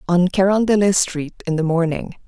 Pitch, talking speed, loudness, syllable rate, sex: 180 Hz, 160 wpm, -18 LUFS, 5.3 syllables/s, female